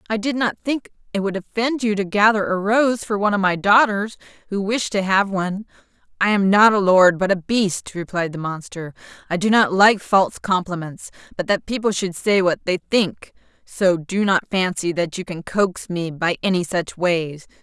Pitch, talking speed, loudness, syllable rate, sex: 195 Hz, 205 wpm, -19 LUFS, 4.9 syllables/s, female